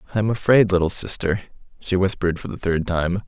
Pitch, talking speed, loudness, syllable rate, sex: 95 Hz, 200 wpm, -21 LUFS, 6.3 syllables/s, male